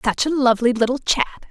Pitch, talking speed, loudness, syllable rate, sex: 250 Hz, 200 wpm, -19 LUFS, 6.7 syllables/s, female